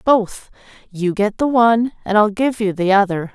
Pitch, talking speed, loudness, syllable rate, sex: 210 Hz, 195 wpm, -17 LUFS, 4.7 syllables/s, female